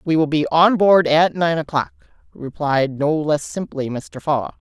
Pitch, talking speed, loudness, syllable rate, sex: 155 Hz, 180 wpm, -18 LUFS, 4.2 syllables/s, female